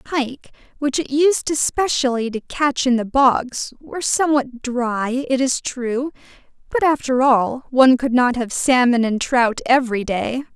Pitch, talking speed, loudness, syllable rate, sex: 255 Hz, 160 wpm, -18 LUFS, 4.2 syllables/s, female